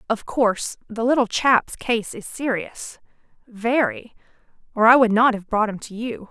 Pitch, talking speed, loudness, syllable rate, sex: 230 Hz, 150 wpm, -20 LUFS, 4.4 syllables/s, female